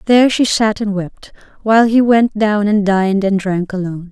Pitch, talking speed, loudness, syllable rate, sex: 205 Hz, 205 wpm, -14 LUFS, 5.2 syllables/s, female